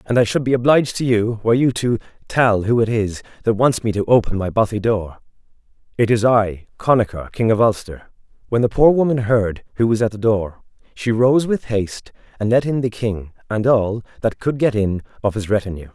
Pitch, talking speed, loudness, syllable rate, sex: 110 Hz, 215 wpm, -18 LUFS, 5.4 syllables/s, male